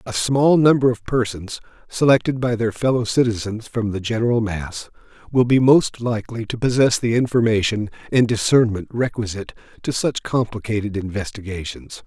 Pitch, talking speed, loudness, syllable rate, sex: 115 Hz, 145 wpm, -19 LUFS, 5.2 syllables/s, male